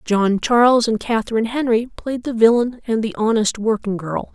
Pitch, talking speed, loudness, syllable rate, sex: 225 Hz, 180 wpm, -18 LUFS, 5.2 syllables/s, female